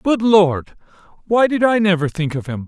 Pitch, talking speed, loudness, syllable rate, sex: 185 Hz, 180 wpm, -16 LUFS, 4.9 syllables/s, male